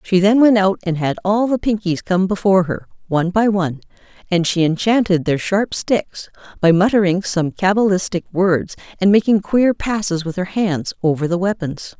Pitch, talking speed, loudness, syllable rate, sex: 190 Hz, 180 wpm, -17 LUFS, 5.0 syllables/s, female